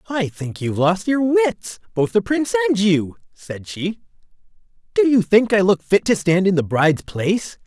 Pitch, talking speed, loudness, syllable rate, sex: 200 Hz, 195 wpm, -18 LUFS, 4.7 syllables/s, male